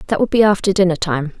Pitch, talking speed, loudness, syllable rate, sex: 185 Hz, 255 wpm, -16 LUFS, 6.8 syllables/s, female